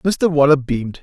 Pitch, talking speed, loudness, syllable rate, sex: 145 Hz, 175 wpm, -16 LUFS, 5.1 syllables/s, male